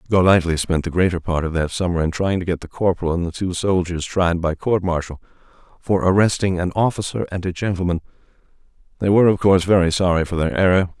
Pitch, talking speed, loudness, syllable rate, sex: 90 Hz, 205 wpm, -19 LUFS, 6.2 syllables/s, male